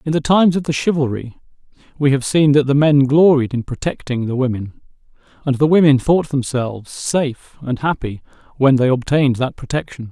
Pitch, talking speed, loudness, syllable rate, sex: 140 Hz, 180 wpm, -17 LUFS, 5.6 syllables/s, male